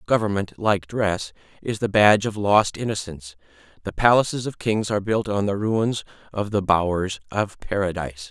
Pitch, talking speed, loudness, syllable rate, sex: 100 Hz, 165 wpm, -22 LUFS, 5.2 syllables/s, male